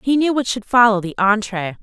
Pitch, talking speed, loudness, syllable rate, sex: 220 Hz, 230 wpm, -17 LUFS, 5.5 syllables/s, female